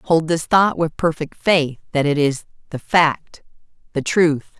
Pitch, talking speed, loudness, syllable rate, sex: 155 Hz, 170 wpm, -18 LUFS, 4.0 syllables/s, female